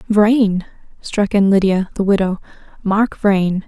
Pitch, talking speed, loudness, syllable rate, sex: 200 Hz, 130 wpm, -16 LUFS, 3.7 syllables/s, female